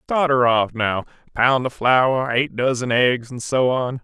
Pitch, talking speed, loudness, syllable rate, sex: 125 Hz, 180 wpm, -19 LUFS, 3.8 syllables/s, male